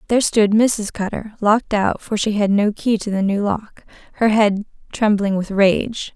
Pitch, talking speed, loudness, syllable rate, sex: 210 Hz, 175 wpm, -18 LUFS, 4.6 syllables/s, female